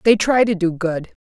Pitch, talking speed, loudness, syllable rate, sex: 195 Hz, 245 wpm, -18 LUFS, 4.9 syllables/s, female